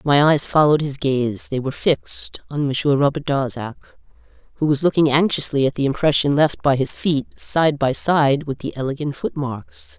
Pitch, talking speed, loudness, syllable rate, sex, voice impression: 140 Hz, 180 wpm, -19 LUFS, 5.1 syllables/s, female, feminine, adult-like, tensed, powerful, clear, fluent, nasal, intellectual, calm, unique, elegant, lively, slightly sharp